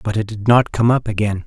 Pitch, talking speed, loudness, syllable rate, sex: 110 Hz, 285 wpm, -17 LUFS, 5.8 syllables/s, male